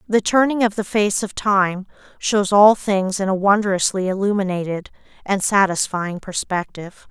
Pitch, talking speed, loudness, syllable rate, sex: 195 Hz, 145 wpm, -19 LUFS, 4.6 syllables/s, female